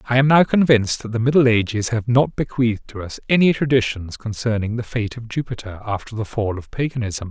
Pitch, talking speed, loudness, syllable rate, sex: 115 Hz, 205 wpm, -20 LUFS, 5.9 syllables/s, male